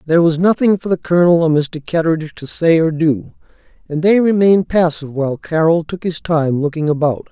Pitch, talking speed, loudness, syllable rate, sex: 165 Hz, 195 wpm, -15 LUFS, 5.8 syllables/s, male